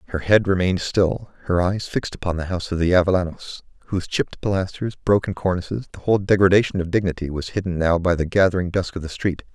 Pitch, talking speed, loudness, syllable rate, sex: 90 Hz, 205 wpm, -21 LUFS, 6.5 syllables/s, male